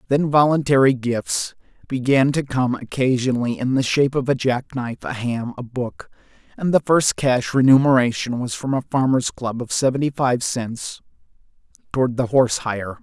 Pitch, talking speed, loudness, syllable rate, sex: 130 Hz, 165 wpm, -20 LUFS, 5.0 syllables/s, male